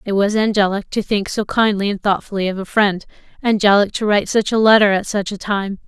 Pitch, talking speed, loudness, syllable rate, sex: 205 Hz, 215 wpm, -17 LUFS, 5.8 syllables/s, female